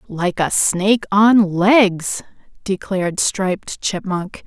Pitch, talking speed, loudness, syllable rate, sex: 195 Hz, 110 wpm, -17 LUFS, 3.4 syllables/s, female